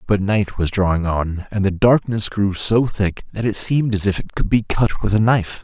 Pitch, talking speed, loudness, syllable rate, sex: 100 Hz, 245 wpm, -19 LUFS, 5.0 syllables/s, male